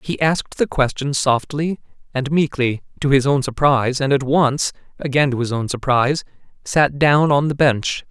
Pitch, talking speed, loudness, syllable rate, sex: 140 Hz, 180 wpm, -18 LUFS, 4.8 syllables/s, male